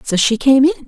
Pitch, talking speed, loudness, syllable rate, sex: 260 Hz, 275 wpm, -13 LUFS, 6.2 syllables/s, female